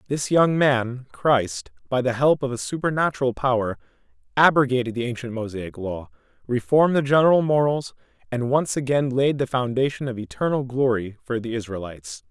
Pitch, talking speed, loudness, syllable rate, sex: 130 Hz, 155 wpm, -22 LUFS, 5.4 syllables/s, male